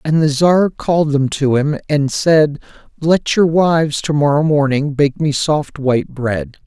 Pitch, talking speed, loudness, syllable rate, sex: 150 Hz, 180 wpm, -15 LUFS, 4.2 syllables/s, male